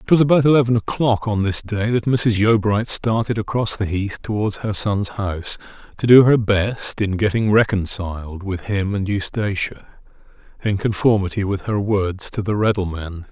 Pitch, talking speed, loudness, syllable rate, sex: 105 Hz, 170 wpm, -19 LUFS, 4.8 syllables/s, male